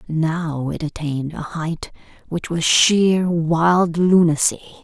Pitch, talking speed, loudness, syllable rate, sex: 165 Hz, 125 wpm, -18 LUFS, 3.5 syllables/s, female